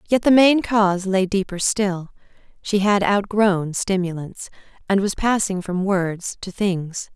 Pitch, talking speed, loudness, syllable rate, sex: 195 Hz, 150 wpm, -20 LUFS, 4.0 syllables/s, female